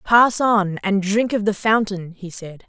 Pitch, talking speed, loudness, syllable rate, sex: 200 Hz, 200 wpm, -19 LUFS, 3.9 syllables/s, female